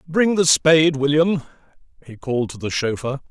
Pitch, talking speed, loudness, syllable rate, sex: 145 Hz, 165 wpm, -18 LUFS, 5.4 syllables/s, male